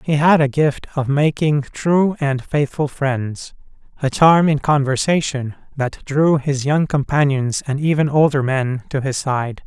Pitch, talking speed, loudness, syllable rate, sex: 140 Hz, 160 wpm, -18 LUFS, 4.0 syllables/s, male